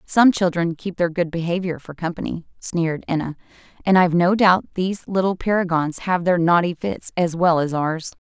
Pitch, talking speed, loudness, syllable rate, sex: 175 Hz, 180 wpm, -20 LUFS, 5.3 syllables/s, female